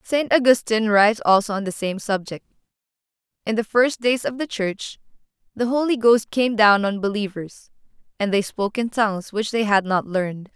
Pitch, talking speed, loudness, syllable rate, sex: 215 Hz, 180 wpm, -20 LUFS, 5.2 syllables/s, female